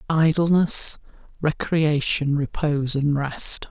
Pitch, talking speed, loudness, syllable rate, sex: 150 Hz, 80 wpm, -21 LUFS, 3.6 syllables/s, male